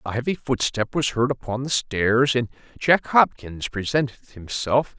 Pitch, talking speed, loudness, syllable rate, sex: 125 Hz, 155 wpm, -22 LUFS, 4.3 syllables/s, male